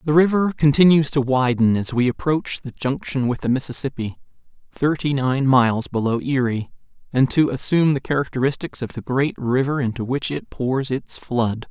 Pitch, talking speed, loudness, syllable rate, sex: 135 Hz, 160 wpm, -20 LUFS, 5.1 syllables/s, male